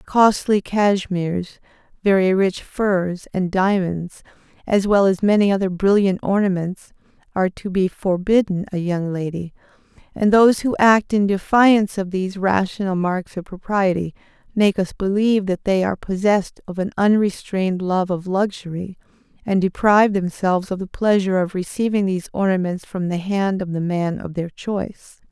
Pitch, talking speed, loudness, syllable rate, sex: 190 Hz, 155 wpm, -19 LUFS, 5.0 syllables/s, female